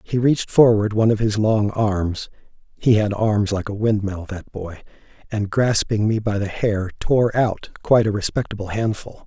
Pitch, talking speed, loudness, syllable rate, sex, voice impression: 105 Hz, 170 wpm, -20 LUFS, 4.7 syllables/s, male, masculine, slightly old, slightly thick, cool, calm, friendly, slightly elegant